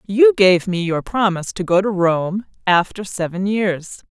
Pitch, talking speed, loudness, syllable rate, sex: 190 Hz, 175 wpm, -18 LUFS, 4.3 syllables/s, female